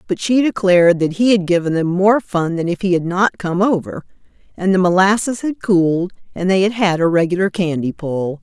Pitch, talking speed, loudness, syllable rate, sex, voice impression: 185 Hz, 215 wpm, -16 LUFS, 5.4 syllables/s, female, feminine, middle-aged, tensed, powerful, slightly hard, clear, intellectual, calm, elegant, lively, slightly strict, slightly sharp